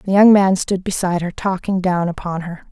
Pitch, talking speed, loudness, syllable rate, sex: 185 Hz, 220 wpm, -17 LUFS, 5.3 syllables/s, female